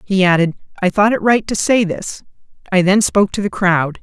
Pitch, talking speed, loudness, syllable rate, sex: 195 Hz, 225 wpm, -15 LUFS, 5.4 syllables/s, female